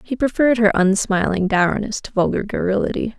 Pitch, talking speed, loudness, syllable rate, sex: 210 Hz, 150 wpm, -18 LUFS, 5.6 syllables/s, female